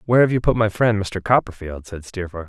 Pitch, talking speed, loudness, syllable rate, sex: 100 Hz, 240 wpm, -20 LUFS, 6.0 syllables/s, male